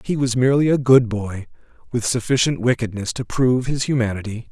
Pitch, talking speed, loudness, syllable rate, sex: 120 Hz, 175 wpm, -19 LUFS, 5.8 syllables/s, male